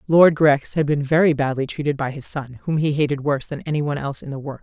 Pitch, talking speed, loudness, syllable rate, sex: 145 Hz, 270 wpm, -20 LUFS, 6.5 syllables/s, female